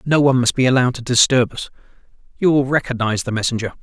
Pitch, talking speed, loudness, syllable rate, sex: 125 Hz, 205 wpm, -17 LUFS, 7.4 syllables/s, male